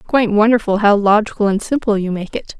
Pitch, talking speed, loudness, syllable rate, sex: 210 Hz, 230 wpm, -15 LUFS, 6.3 syllables/s, female